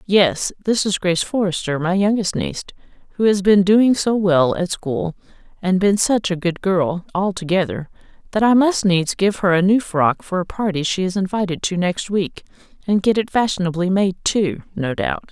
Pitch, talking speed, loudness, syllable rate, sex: 190 Hz, 190 wpm, -18 LUFS, 4.8 syllables/s, female